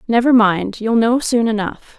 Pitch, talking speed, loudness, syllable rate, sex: 225 Hz, 180 wpm, -16 LUFS, 4.4 syllables/s, female